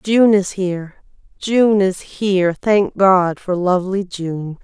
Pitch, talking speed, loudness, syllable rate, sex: 190 Hz, 130 wpm, -17 LUFS, 3.6 syllables/s, female